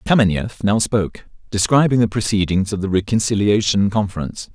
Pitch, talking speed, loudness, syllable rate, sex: 105 Hz, 130 wpm, -18 LUFS, 5.9 syllables/s, male